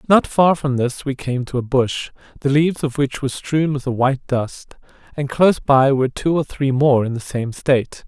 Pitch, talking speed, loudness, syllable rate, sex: 135 Hz, 230 wpm, -18 LUFS, 5.1 syllables/s, male